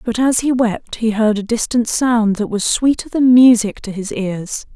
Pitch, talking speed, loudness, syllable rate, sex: 225 Hz, 215 wpm, -15 LUFS, 4.4 syllables/s, female